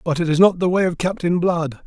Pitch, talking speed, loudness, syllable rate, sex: 170 Hz, 290 wpm, -18 LUFS, 5.8 syllables/s, male